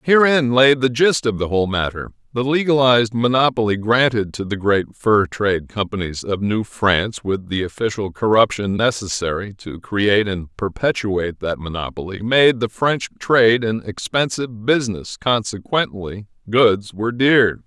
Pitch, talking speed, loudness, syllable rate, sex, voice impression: 110 Hz, 145 wpm, -18 LUFS, 4.8 syllables/s, male, very masculine, very adult-like, thick, slightly mature, wild